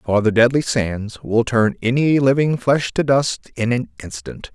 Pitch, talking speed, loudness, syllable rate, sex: 120 Hz, 185 wpm, -18 LUFS, 4.5 syllables/s, male